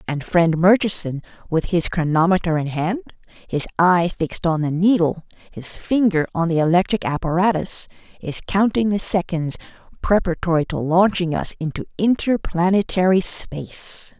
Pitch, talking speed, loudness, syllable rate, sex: 175 Hz, 130 wpm, -20 LUFS, 4.8 syllables/s, female